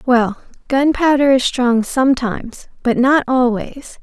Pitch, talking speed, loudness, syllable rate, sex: 255 Hz, 120 wpm, -15 LUFS, 4.1 syllables/s, female